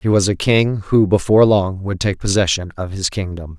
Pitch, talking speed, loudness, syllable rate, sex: 100 Hz, 215 wpm, -17 LUFS, 5.1 syllables/s, male